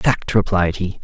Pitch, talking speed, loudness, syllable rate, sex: 95 Hz, 175 wpm, -19 LUFS, 4.0 syllables/s, male